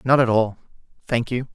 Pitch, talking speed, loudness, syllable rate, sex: 120 Hz, 195 wpm, -21 LUFS, 5.4 syllables/s, male